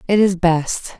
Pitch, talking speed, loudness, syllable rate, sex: 180 Hz, 180 wpm, -17 LUFS, 3.8 syllables/s, female